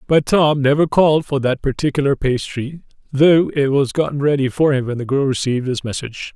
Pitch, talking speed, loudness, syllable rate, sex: 140 Hz, 200 wpm, -17 LUFS, 5.6 syllables/s, male